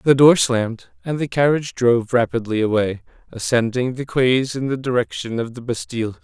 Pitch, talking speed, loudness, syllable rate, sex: 120 Hz, 175 wpm, -19 LUFS, 5.4 syllables/s, male